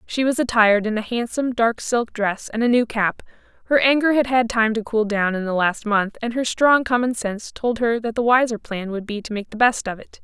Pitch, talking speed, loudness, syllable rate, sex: 230 Hz, 260 wpm, -20 LUFS, 5.5 syllables/s, female